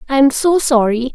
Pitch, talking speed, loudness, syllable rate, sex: 265 Hz, 155 wpm, -14 LUFS, 4.2 syllables/s, female